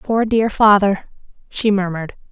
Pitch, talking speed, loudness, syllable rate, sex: 205 Hz, 130 wpm, -16 LUFS, 4.5 syllables/s, female